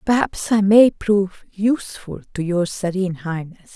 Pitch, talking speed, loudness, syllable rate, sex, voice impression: 195 Hz, 145 wpm, -19 LUFS, 4.8 syllables/s, female, feminine, middle-aged, slightly relaxed, slightly powerful, muffled, raspy, intellectual, calm, slightly friendly, reassuring, slightly strict